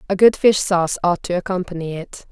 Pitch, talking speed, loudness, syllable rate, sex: 185 Hz, 205 wpm, -18 LUFS, 5.8 syllables/s, female